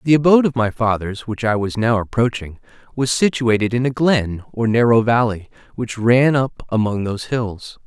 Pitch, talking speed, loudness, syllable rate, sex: 115 Hz, 185 wpm, -18 LUFS, 5.0 syllables/s, male